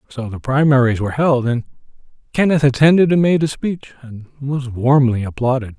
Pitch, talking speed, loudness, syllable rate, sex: 135 Hz, 165 wpm, -16 LUFS, 5.3 syllables/s, male